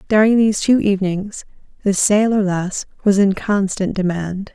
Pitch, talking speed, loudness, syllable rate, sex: 200 Hz, 145 wpm, -17 LUFS, 4.7 syllables/s, female